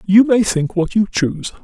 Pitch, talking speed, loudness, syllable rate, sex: 195 Hz, 220 wpm, -16 LUFS, 5.2 syllables/s, male